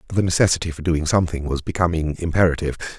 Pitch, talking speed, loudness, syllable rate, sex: 80 Hz, 160 wpm, -21 LUFS, 7.3 syllables/s, male